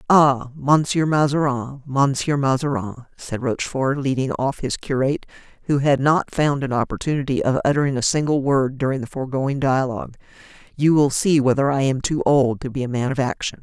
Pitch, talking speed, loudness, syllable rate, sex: 135 Hz, 175 wpm, -20 LUFS, 5.4 syllables/s, female